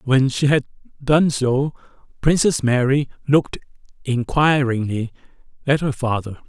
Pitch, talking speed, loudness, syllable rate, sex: 135 Hz, 110 wpm, -19 LUFS, 4.5 syllables/s, male